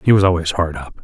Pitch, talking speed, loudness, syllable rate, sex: 85 Hz, 290 wpm, -17 LUFS, 6.5 syllables/s, male